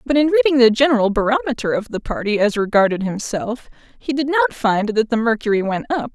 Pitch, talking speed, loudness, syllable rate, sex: 240 Hz, 205 wpm, -18 LUFS, 6.0 syllables/s, female